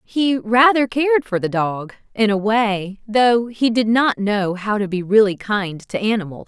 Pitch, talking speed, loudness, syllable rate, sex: 215 Hz, 195 wpm, -18 LUFS, 4.3 syllables/s, female